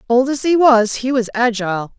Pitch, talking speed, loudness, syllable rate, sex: 240 Hz, 210 wpm, -15 LUFS, 5.0 syllables/s, female